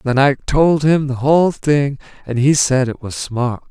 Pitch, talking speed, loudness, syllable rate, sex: 140 Hz, 210 wpm, -16 LUFS, 4.3 syllables/s, male